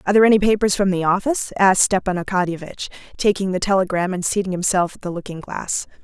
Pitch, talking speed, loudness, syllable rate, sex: 190 Hz, 200 wpm, -19 LUFS, 6.7 syllables/s, female